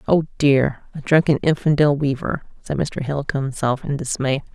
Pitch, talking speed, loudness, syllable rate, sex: 140 Hz, 170 wpm, -20 LUFS, 4.9 syllables/s, female